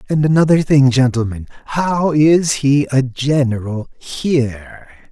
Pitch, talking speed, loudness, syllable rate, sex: 135 Hz, 115 wpm, -15 LUFS, 4.0 syllables/s, male